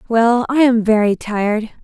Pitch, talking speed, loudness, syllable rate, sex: 225 Hz, 165 wpm, -15 LUFS, 4.4 syllables/s, female